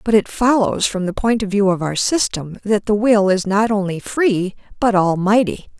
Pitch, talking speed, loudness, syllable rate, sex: 205 Hz, 205 wpm, -17 LUFS, 4.7 syllables/s, female